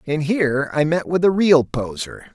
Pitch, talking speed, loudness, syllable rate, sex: 155 Hz, 205 wpm, -18 LUFS, 4.6 syllables/s, male